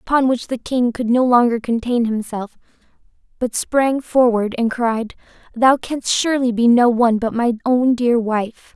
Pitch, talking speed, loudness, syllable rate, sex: 240 Hz, 170 wpm, -17 LUFS, 4.4 syllables/s, female